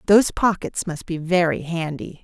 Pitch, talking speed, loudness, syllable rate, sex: 170 Hz, 160 wpm, -21 LUFS, 4.9 syllables/s, female